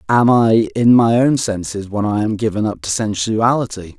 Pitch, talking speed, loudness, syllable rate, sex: 110 Hz, 195 wpm, -16 LUFS, 4.8 syllables/s, male